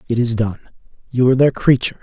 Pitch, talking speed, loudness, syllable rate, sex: 120 Hz, 180 wpm, -16 LUFS, 7.5 syllables/s, male